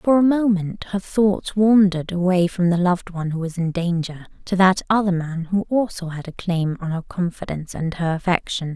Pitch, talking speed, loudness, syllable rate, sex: 180 Hz, 205 wpm, -21 LUFS, 5.3 syllables/s, female